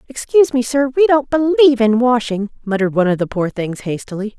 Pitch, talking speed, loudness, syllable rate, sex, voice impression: 240 Hz, 205 wpm, -16 LUFS, 6.2 syllables/s, female, very feminine, slightly young, adult-like, thin, tensed, powerful, very bright, soft, very clear, very fluent, slightly cute, cool, slightly intellectual, very refreshing, slightly sincere, slightly calm, friendly, reassuring, very unique, slightly elegant, wild, slightly sweet, very lively, strict, intense, very sharp, slightly light